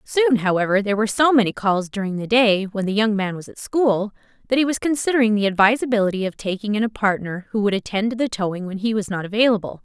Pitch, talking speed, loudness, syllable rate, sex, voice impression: 215 Hz, 240 wpm, -20 LUFS, 6.4 syllables/s, female, feminine, slightly adult-like, tensed, slightly bright, fluent, slightly cute, slightly refreshing, friendly